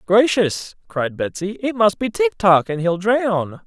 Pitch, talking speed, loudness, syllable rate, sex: 185 Hz, 180 wpm, -19 LUFS, 3.8 syllables/s, male